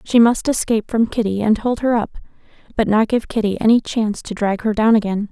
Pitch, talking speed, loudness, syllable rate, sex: 220 Hz, 225 wpm, -18 LUFS, 6.0 syllables/s, female